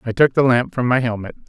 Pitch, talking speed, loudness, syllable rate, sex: 125 Hz, 285 wpm, -17 LUFS, 6.4 syllables/s, male